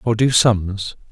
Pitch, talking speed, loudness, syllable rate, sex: 105 Hz, 160 wpm, -17 LUFS, 3.4 syllables/s, male